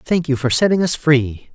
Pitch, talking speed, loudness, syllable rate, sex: 140 Hz, 235 wpm, -16 LUFS, 4.6 syllables/s, male